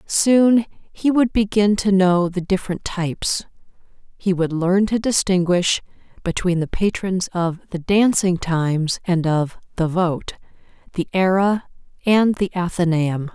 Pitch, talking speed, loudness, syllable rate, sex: 185 Hz, 135 wpm, -19 LUFS, 4.0 syllables/s, female